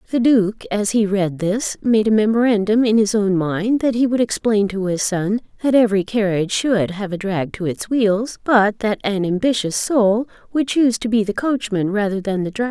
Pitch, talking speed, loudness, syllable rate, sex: 210 Hz, 210 wpm, -18 LUFS, 4.9 syllables/s, female